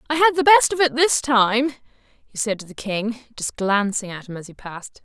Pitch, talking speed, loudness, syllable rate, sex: 240 Hz, 240 wpm, -19 LUFS, 5.1 syllables/s, female